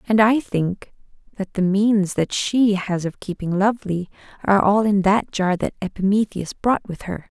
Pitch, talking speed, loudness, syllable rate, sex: 200 Hz, 180 wpm, -20 LUFS, 4.6 syllables/s, female